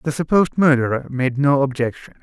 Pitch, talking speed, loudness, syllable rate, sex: 140 Hz, 160 wpm, -18 LUFS, 5.7 syllables/s, male